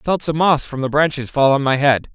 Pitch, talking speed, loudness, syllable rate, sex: 145 Hz, 305 wpm, -17 LUFS, 5.9 syllables/s, male